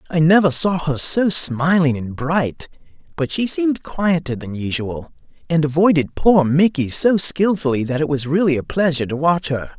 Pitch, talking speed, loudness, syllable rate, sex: 155 Hz, 180 wpm, -18 LUFS, 4.8 syllables/s, male